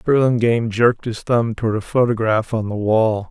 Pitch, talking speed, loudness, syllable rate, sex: 115 Hz, 180 wpm, -18 LUFS, 5.3 syllables/s, male